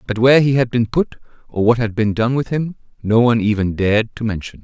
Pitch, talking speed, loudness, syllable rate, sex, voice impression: 115 Hz, 245 wpm, -17 LUFS, 6.1 syllables/s, male, masculine, adult-like, slightly thick, slightly fluent, slightly refreshing, sincere, friendly